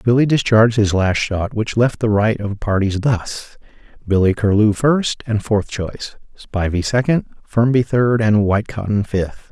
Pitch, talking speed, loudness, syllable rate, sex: 110 Hz, 160 wpm, -17 LUFS, 4.6 syllables/s, male